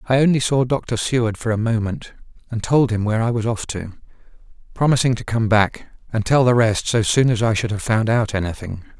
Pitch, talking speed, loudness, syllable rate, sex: 115 Hz, 220 wpm, -19 LUFS, 5.5 syllables/s, male